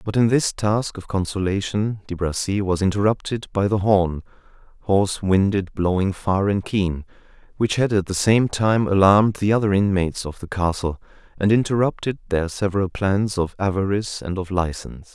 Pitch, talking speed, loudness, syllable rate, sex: 100 Hz, 165 wpm, -21 LUFS, 5.1 syllables/s, male